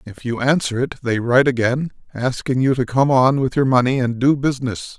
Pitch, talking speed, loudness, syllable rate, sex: 130 Hz, 215 wpm, -18 LUFS, 5.5 syllables/s, male